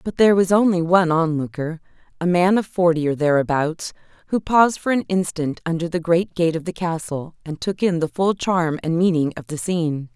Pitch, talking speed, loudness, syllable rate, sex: 170 Hz, 205 wpm, -20 LUFS, 5.4 syllables/s, female